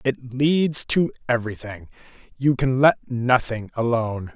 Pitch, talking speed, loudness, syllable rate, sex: 125 Hz, 125 wpm, -21 LUFS, 4.3 syllables/s, male